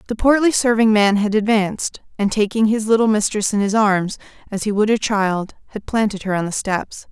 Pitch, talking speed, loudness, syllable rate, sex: 210 Hz, 210 wpm, -18 LUFS, 5.3 syllables/s, female